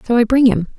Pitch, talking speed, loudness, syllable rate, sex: 230 Hz, 305 wpm, -14 LUFS, 7.3 syllables/s, female